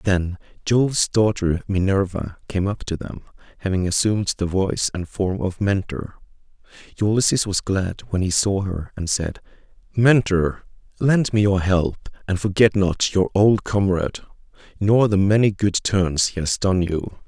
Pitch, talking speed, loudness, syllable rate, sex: 95 Hz, 155 wpm, -21 LUFS, 4.5 syllables/s, male